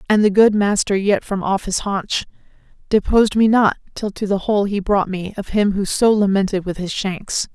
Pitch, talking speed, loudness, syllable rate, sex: 200 Hz, 215 wpm, -18 LUFS, 5.0 syllables/s, female